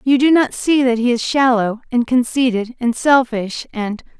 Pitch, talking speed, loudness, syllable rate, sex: 245 Hz, 185 wpm, -16 LUFS, 4.5 syllables/s, female